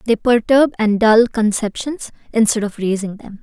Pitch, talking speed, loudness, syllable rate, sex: 225 Hz, 160 wpm, -16 LUFS, 4.6 syllables/s, female